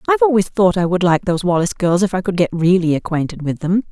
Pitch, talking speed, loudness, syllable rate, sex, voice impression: 185 Hz, 260 wpm, -16 LUFS, 6.9 syllables/s, female, feminine, adult-like, fluent, intellectual, calm, slightly sweet